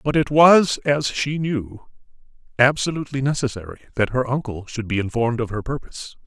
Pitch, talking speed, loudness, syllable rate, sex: 130 Hz, 165 wpm, -20 LUFS, 5.5 syllables/s, male